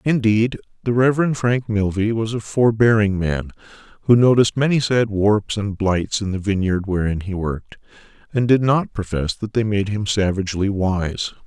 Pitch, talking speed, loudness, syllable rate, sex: 105 Hz, 165 wpm, -19 LUFS, 4.9 syllables/s, male